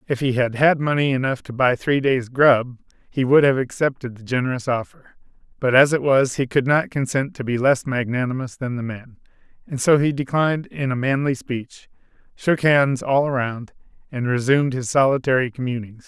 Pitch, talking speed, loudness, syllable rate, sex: 130 Hz, 185 wpm, -20 LUFS, 5.2 syllables/s, male